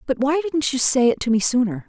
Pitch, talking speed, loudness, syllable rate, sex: 265 Hz, 285 wpm, -19 LUFS, 5.8 syllables/s, female